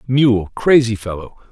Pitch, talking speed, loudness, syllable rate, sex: 115 Hz, 120 wpm, -15 LUFS, 3.9 syllables/s, male